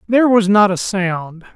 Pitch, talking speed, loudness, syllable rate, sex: 200 Hz, 195 wpm, -15 LUFS, 4.6 syllables/s, male